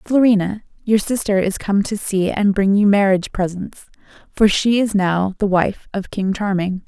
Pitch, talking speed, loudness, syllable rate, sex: 200 Hz, 185 wpm, -18 LUFS, 4.7 syllables/s, female